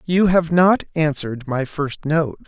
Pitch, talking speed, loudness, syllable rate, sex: 155 Hz, 170 wpm, -19 LUFS, 4.1 syllables/s, male